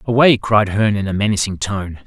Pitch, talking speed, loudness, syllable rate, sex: 105 Hz, 205 wpm, -16 LUFS, 5.6 syllables/s, male